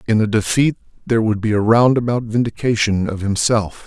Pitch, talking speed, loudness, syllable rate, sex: 110 Hz, 170 wpm, -17 LUFS, 5.6 syllables/s, male